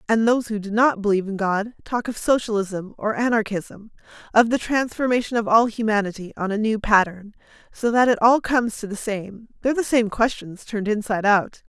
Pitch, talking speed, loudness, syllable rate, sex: 220 Hz, 195 wpm, -21 LUFS, 5.6 syllables/s, female